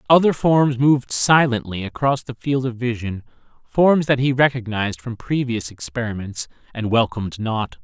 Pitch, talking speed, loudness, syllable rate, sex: 120 Hz, 145 wpm, -20 LUFS, 4.9 syllables/s, male